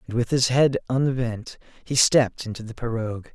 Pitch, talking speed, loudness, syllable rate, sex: 120 Hz, 180 wpm, -23 LUFS, 5.3 syllables/s, male